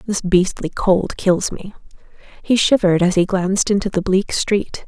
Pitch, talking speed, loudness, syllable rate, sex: 190 Hz, 170 wpm, -17 LUFS, 4.7 syllables/s, female